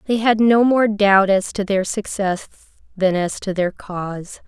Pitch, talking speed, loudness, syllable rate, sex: 200 Hz, 190 wpm, -18 LUFS, 4.2 syllables/s, female